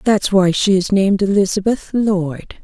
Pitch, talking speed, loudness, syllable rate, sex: 195 Hz, 160 wpm, -16 LUFS, 4.5 syllables/s, female